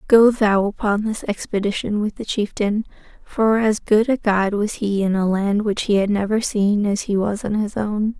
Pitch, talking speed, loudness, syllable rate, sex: 210 Hz, 210 wpm, -20 LUFS, 4.7 syllables/s, female